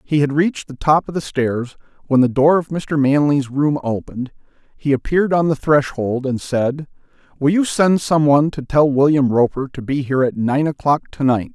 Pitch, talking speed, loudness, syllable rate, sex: 145 Hz, 205 wpm, -17 LUFS, 5.2 syllables/s, male